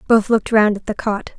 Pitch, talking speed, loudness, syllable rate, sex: 215 Hz, 260 wpm, -17 LUFS, 5.9 syllables/s, female